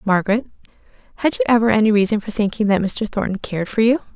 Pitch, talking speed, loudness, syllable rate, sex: 210 Hz, 200 wpm, -18 LUFS, 7.0 syllables/s, female